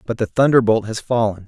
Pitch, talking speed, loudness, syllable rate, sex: 115 Hz, 205 wpm, -17 LUFS, 5.9 syllables/s, male